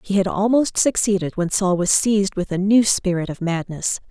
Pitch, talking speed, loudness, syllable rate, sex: 195 Hz, 205 wpm, -19 LUFS, 5.1 syllables/s, female